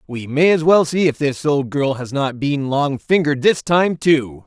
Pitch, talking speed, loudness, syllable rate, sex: 145 Hz, 230 wpm, -17 LUFS, 4.4 syllables/s, male